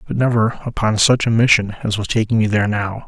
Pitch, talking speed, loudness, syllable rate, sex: 110 Hz, 235 wpm, -17 LUFS, 6.1 syllables/s, male